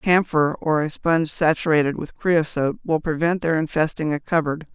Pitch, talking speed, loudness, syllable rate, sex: 160 Hz, 165 wpm, -21 LUFS, 5.2 syllables/s, female